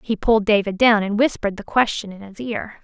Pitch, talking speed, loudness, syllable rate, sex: 210 Hz, 235 wpm, -19 LUFS, 5.9 syllables/s, female